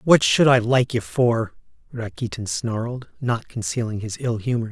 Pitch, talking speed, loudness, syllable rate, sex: 120 Hz, 165 wpm, -22 LUFS, 4.6 syllables/s, male